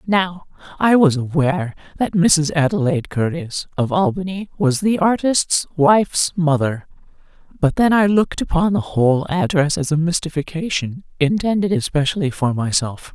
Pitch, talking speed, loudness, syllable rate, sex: 170 Hz, 130 wpm, -18 LUFS, 4.9 syllables/s, female